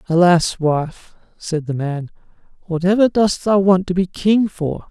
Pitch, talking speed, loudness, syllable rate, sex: 180 Hz, 160 wpm, -17 LUFS, 4.1 syllables/s, male